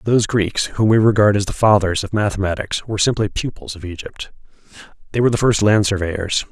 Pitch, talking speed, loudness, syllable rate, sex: 105 Hz, 195 wpm, -17 LUFS, 5.9 syllables/s, male